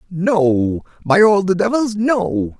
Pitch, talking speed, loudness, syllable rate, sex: 185 Hz, 140 wpm, -16 LUFS, 3.2 syllables/s, male